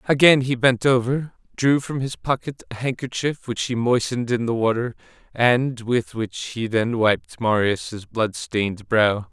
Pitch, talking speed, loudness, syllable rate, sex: 120 Hz, 165 wpm, -21 LUFS, 4.3 syllables/s, male